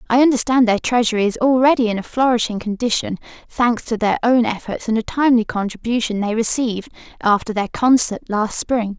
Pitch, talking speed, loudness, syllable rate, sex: 230 Hz, 175 wpm, -18 LUFS, 5.7 syllables/s, female